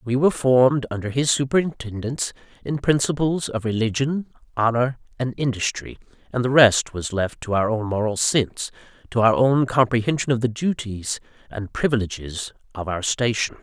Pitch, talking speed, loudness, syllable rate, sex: 120 Hz, 155 wpm, -22 LUFS, 5.2 syllables/s, male